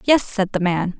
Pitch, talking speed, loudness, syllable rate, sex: 200 Hz, 240 wpm, -19 LUFS, 4.5 syllables/s, female